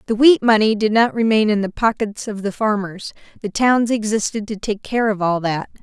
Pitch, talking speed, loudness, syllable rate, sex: 215 Hz, 215 wpm, -18 LUFS, 5.2 syllables/s, female